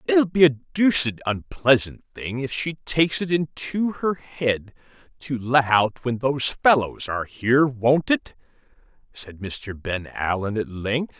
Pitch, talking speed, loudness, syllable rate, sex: 130 Hz, 155 wpm, -22 LUFS, 4.0 syllables/s, male